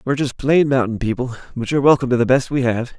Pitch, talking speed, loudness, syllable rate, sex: 125 Hz, 260 wpm, -18 LUFS, 7.2 syllables/s, male